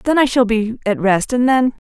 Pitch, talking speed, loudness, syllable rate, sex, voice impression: 235 Hz, 255 wpm, -16 LUFS, 4.9 syllables/s, female, very feminine, adult-like, sincere, slightly friendly